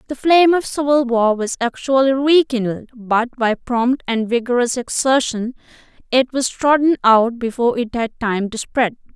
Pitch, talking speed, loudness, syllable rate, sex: 245 Hz, 155 wpm, -17 LUFS, 4.7 syllables/s, female